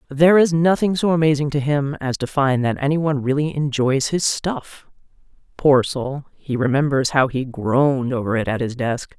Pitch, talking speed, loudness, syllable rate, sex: 140 Hz, 190 wpm, -19 LUFS, 5.0 syllables/s, female